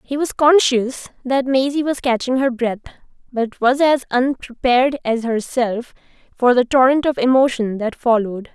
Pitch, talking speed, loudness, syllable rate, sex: 250 Hz, 155 wpm, -17 LUFS, 4.7 syllables/s, female